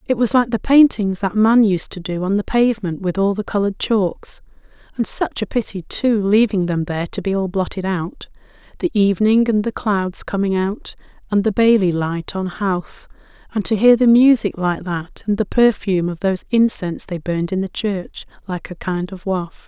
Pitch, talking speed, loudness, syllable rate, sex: 200 Hz, 205 wpm, -18 LUFS, 5.0 syllables/s, female